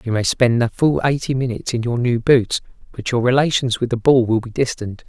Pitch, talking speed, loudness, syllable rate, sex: 120 Hz, 235 wpm, -18 LUFS, 5.6 syllables/s, male